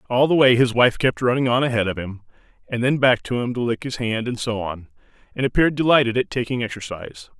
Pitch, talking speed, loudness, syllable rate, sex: 120 Hz, 235 wpm, -20 LUFS, 6.4 syllables/s, male